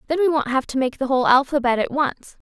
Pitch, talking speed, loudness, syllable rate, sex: 270 Hz, 260 wpm, -20 LUFS, 6.3 syllables/s, female